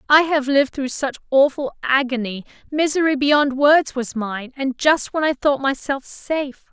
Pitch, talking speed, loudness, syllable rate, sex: 275 Hz, 160 wpm, -19 LUFS, 4.5 syllables/s, female